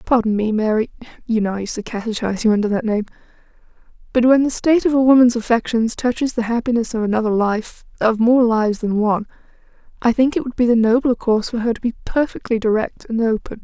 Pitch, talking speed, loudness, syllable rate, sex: 230 Hz, 195 wpm, -18 LUFS, 6.4 syllables/s, female